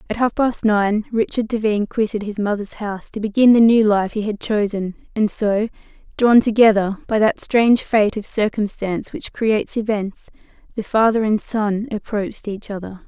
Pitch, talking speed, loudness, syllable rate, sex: 215 Hz, 175 wpm, -19 LUFS, 5.0 syllables/s, female